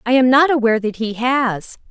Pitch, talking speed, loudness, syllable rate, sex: 245 Hz, 220 wpm, -16 LUFS, 5.3 syllables/s, female